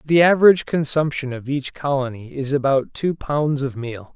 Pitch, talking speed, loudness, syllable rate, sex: 140 Hz, 175 wpm, -20 LUFS, 5.0 syllables/s, male